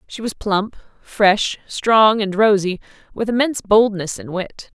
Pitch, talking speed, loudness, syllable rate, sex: 205 Hz, 150 wpm, -17 LUFS, 4.1 syllables/s, female